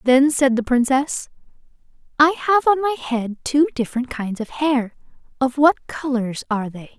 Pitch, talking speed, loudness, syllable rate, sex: 265 Hz, 165 wpm, -19 LUFS, 5.1 syllables/s, female